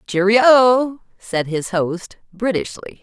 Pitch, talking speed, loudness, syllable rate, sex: 215 Hz, 120 wpm, -17 LUFS, 4.0 syllables/s, female